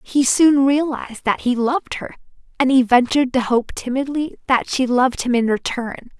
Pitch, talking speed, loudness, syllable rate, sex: 260 Hz, 185 wpm, -18 LUFS, 5.1 syllables/s, female